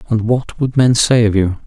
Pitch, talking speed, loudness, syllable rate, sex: 115 Hz, 250 wpm, -14 LUFS, 4.8 syllables/s, male